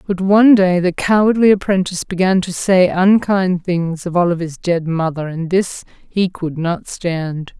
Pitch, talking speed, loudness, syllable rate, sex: 180 Hz, 165 wpm, -16 LUFS, 4.4 syllables/s, female